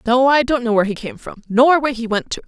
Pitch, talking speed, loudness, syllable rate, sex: 245 Hz, 315 wpm, -17 LUFS, 6.6 syllables/s, female